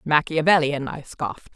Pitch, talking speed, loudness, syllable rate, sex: 145 Hz, 115 wpm, -22 LUFS, 4.9 syllables/s, female